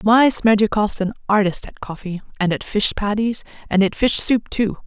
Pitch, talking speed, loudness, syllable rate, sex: 210 Hz, 185 wpm, -19 LUFS, 4.9 syllables/s, female